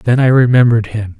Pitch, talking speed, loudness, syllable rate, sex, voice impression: 115 Hz, 200 wpm, -11 LUFS, 6.1 syllables/s, male, masculine, adult-like, slightly relaxed, weak, clear, slightly halting, slightly sincere, friendly, slightly reassuring, unique, lively, kind, modest